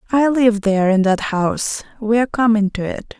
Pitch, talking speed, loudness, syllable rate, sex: 215 Hz, 205 wpm, -17 LUFS, 5.3 syllables/s, female